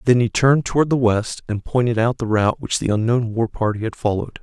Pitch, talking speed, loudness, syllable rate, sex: 115 Hz, 245 wpm, -19 LUFS, 6.1 syllables/s, male